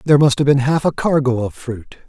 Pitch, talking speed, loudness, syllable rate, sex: 135 Hz, 260 wpm, -16 LUFS, 5.8 syllables/s, male